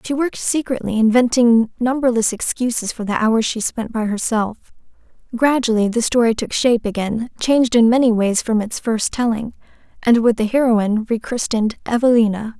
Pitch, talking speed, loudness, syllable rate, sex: 230 Hz, 155 wpm, -17 LUFS, 5.3 syllables/s, female